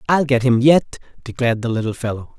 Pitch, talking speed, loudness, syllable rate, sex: 125 Hz, 200 wpm, -17 LUFS, 6.3 syllables/s, male